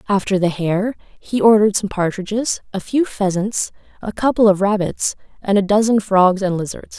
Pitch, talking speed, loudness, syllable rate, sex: 200 Hz, 170 wpm, -17 LUFS, 4.9 syllables/s, female